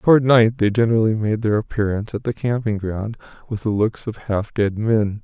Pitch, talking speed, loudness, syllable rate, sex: 110 Hz, 205 wpm, -20 LUFS, 5.4 syllables/s, male